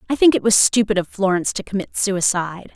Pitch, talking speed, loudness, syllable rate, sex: 200 Hz, 215 wpm, -18 LUFS, 6.2 syllables/s, female